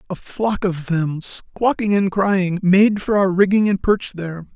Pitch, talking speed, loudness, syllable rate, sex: 190 Hz, 185 wpm, -18 LUFS, 4.3 syllables/s, male